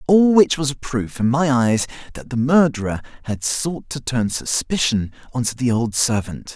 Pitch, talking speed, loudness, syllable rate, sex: 130 Hz, 190 wpm, -19 LUFS, 4.6 syllables/s, male